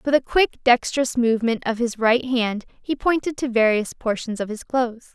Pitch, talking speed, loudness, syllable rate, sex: 240 Hz, 200 wpm, -21 LUFS, 5.3 syllables/s, female